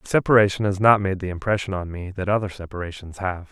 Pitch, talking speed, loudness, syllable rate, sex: 95 Hz, 220 wpm, -22 LUFS, 6.4 syllables/s, male